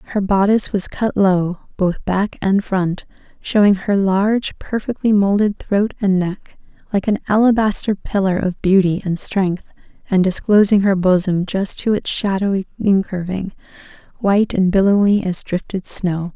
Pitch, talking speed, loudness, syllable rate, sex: 195 Hz, 145 wpm, -17 LUFS, 4.6 syllables/s, female